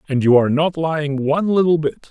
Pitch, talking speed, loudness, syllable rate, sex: 150 Hz, 230 wpm, -17 LUFS, 6.7 syllables/s, male